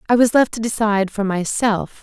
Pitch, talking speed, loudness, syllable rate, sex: 215 Hz, 205 wpm, -18 LUFS, 5.4 syllables/s, female